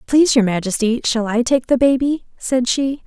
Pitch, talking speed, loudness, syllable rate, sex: 250 Hz, 195 wpm, -17 LUFS, 5.1 syllables/s, female